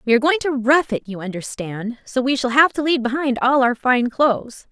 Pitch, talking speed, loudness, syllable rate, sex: 255 Hz, 240 wpm, -19 LUFS, 5.6 syllables/s, female